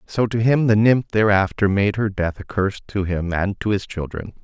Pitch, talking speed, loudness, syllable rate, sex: 100 Hz, 230 wpm, -20 LUFS, 5.2 syllables/s, male